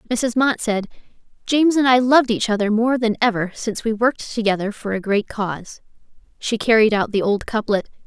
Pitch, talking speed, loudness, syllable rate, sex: 225 Hz, 195 wpm, -19 LUFS, 5.7 syllables/s, female